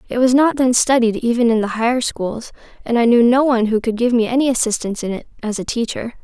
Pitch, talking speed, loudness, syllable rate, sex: 235 Hz, 250 wpm, -17 LUFS, 6.3 syllables/s, female